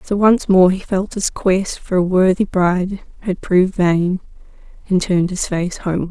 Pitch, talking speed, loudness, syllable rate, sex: 185 Hz, 185 wpm, -17 LUFS, 4.8 syllables/s, female